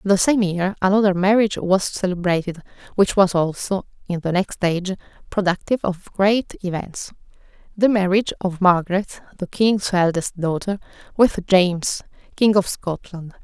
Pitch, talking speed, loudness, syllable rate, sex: 190 Hz, 140 wpm, -20 LUFS, 4.9 syllables/s, female